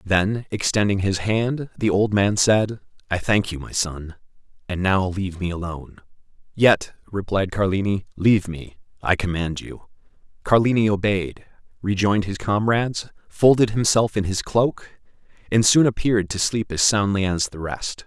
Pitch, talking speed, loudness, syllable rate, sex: 100 Hz, 145 wpm, -21 LUFS, 4.7 syllables/s, male